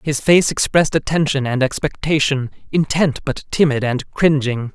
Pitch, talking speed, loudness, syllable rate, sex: 145 Hz, 140 wpm, -17 LUFS, 4.8 syllables/s, male